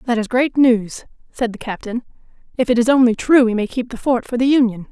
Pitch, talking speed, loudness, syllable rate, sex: 240 Hz, 245 wpm, -17 LUFS, 5.7 syllables/s, female